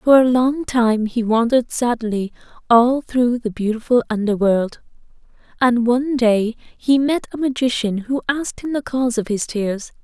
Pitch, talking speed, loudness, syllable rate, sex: 240 Hz, 160 wpm, -18 LUFS, 4.6 syllables/s, female